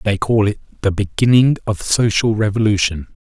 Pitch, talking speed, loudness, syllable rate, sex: 105 Hz, 150 wpm, -16 LUFS, 5.2 syllables/s, male